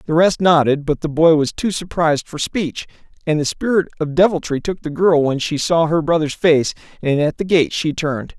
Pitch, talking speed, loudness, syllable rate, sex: 160 Hz, 220 wpm, -17 LUFS, 5.3 syllables/s, male